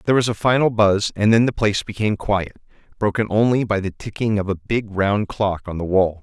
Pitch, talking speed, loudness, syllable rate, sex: 105 Hz, 230 wpm, -20 LUFS, 5.8 syllables/s, male